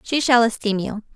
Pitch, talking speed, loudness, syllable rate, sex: 230 Hz, 210 wpm, -19 LUFS, 5.2 syllables/s, female